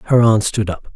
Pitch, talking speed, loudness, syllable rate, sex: 110 Hz, 250 wpm, -16 LUFS, 4.4 syllables/s, male